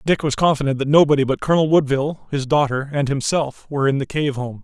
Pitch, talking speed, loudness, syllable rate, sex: 140 Hz, 220 wpm, -19 LUFS, 6.3 syllables/s, male